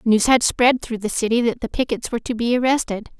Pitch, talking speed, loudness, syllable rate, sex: 235 Hz, 245 wpm, -19 LUFS, 5.9 syllables/s, female